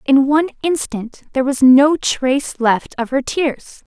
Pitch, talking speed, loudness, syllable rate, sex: 270 Hz, 165 wpm, -16 LUFS, 4.3 syllables/s, female